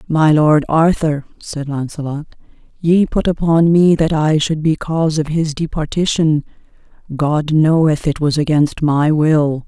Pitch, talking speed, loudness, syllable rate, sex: 155 Hz, 150 wpm, -15 LUFS, 4.1 syllables/s, female